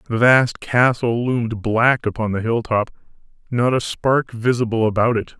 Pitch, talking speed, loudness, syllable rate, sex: 115 Hz, 155 wpm, -18 LUFS, 4.5 syllables/s, male